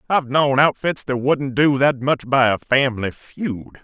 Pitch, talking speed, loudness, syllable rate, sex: 135 Hz, 190 wpm, -19 LUFS, 4.5 syllables/s, male